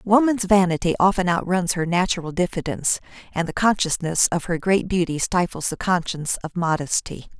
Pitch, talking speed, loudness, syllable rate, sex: 175 Hz, 155 wpm, -21 LUFS, 5.5 syllables/s, female